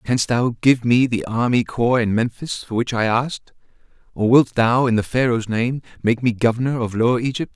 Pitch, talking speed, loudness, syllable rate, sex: 120 Hz, 205 wpm, -19 LUFS, 5.2 syllables/s, male